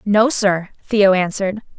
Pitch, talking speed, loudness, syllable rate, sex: 200 Hz, 135 wpm, -17 LUFS, 4.2 syllables/s, female